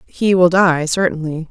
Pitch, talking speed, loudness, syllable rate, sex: 170 Hz, 160 wpm, -15 LUFS, 4.4 syllables/s, female